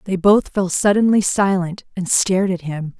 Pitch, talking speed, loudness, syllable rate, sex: 190 Hz, 180 wpm, -17 LUFS, 4.7 syllables/s, female